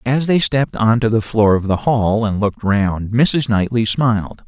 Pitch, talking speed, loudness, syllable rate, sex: 110 Hz, 215 wpm, -16 LUFS, 4.6 syllables/s, male